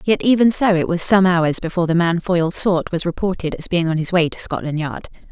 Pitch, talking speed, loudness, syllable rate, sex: 175 Hz, 250 wpm, -18 LUFS, 5.8 syllables/s, female